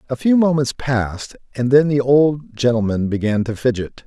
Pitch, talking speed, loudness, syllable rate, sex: 130 Hz, 175 wpm, -18 LUFS, 4.9 syllables/s, male